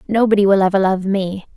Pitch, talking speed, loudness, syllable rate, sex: 195 Hz, 190 wpm, -16 LUFS, 6.0 syllables/s, female